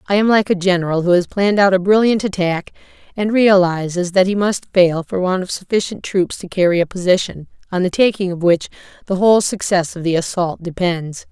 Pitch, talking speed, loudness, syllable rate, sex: 185 Hz, 205 wpm, -16 LUFS, 5.7 syllables/s, female